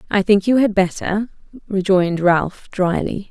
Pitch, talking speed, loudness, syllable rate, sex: 195 Hz, 145 wpm, -18 LUFS, 4.5 syllables/s, female